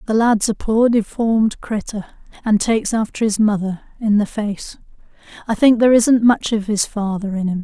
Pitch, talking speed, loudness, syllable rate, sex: 215 Hz, 190 wpm, -17 LUFS, 5.0 syllables/s, female